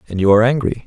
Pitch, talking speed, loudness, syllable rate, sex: 115 Hz, 280 wpm, -15 LUFS, 8.5 syllables/s, male